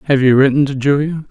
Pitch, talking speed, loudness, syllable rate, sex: 140 Hz, 230 wpm, -13 LUFS, 6.4 syllables/s, male